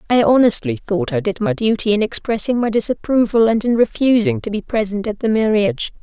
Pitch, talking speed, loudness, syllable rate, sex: 210 Hz, 200 wpm, -17 LUFS, 5.7 syllables/s, female